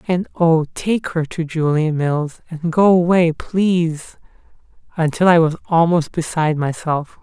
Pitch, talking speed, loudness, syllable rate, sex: 165 Hz, 140 wpm, -17 LUFS, 4.1 syllables/s, male